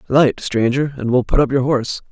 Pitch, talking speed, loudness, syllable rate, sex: 130 Hz, 225 wpm, -17 LUFS, 5.4 syllables/s, male